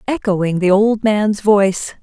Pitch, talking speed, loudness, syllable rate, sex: 205 Hz, 150 wpm, -15 LUFS, 3.9 syllables/s, female